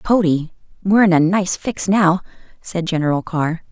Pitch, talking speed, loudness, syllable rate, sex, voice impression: 175 Hz, 160 wpm, -17 LUFS, 4.8 syllables/s, female, very feminine, adult-like, fluent, sincere, friendly, slightly kind